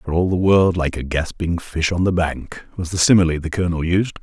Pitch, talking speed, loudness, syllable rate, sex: 85 Hz, 240 wpm, -19 LUFS, 5.5 syllables/s, male